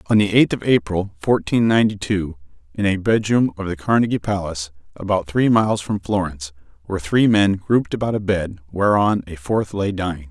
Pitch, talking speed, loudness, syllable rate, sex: 95 Hz, 185 wpm, -19 LUFS, 5.5 syllables/s, male